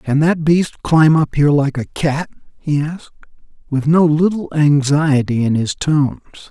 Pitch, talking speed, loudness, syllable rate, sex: 150 Hz, 165 wpm, -15 LUFS, 4.5 syllables/s, male